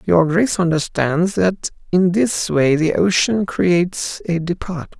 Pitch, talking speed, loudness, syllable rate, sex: 170 Hz, 145 wpm, -17 LUFS, 4.1 syllables/s, male